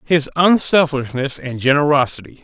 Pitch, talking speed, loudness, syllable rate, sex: 140 Hz, 100 wpm, -16 LUFS, 4.9 syllables/s, male